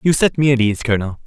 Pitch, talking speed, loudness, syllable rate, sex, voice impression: 125 Hz, 285 wpm, -16 LUFS, 7.1 syllables/s, male, masculine, adult-like, bright, clear, fluent, intellectual, refreshing, friendly, lively, kind, light